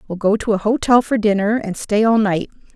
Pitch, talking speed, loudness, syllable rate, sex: 215 Hz, 240 wpm, -17 LUFS, 5.6 syllables/s, female